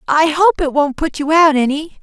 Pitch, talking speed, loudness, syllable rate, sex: 305 Hz, 235 wpm, -14 LUFS, 5.0 syllables/s, female